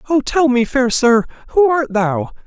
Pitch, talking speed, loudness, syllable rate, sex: 240 Hz, 195 wpm, -15 LUFS, 4.4 syllables/s, male